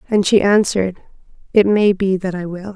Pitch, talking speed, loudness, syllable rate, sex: 195 Hz, 195 wpm, -16 LUFS, 5.3 syllables/s, female